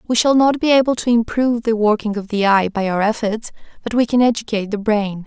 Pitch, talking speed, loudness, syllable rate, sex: 225 Hz, 240 wpm, -17 LUFS, 6.0 syllables/s, female